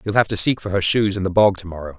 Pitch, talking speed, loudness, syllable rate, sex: 95 Hz, 360 wpm, -18 LUFS, 7.1 syllables/s, male